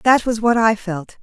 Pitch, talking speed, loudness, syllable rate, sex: 220 Hz, 245 wpm, -17 LUFS, 4.4 syllables/s, female